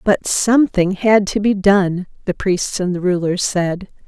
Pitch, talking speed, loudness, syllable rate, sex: 190 Hz, 175 wpm, -17 LUFS, 4.1 syllables/s, female